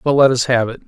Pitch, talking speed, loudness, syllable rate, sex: 125 Hz, 345 wpm, -15 LUFS, 6.8 syllables/s, male